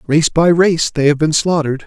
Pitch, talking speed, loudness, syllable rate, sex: 155 Hz, 225 wpm, -14 LUFS, 5.2 syllables/s, male